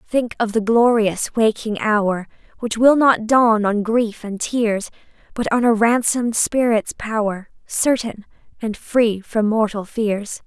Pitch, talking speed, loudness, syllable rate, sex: 220 Hz, 150 wpm, -18 LUFS, 3.8 syllables/s, female